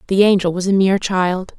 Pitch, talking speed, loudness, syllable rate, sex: 190 Hz, 230 wpm, -16 LUFS, 5.7 syllables/s, female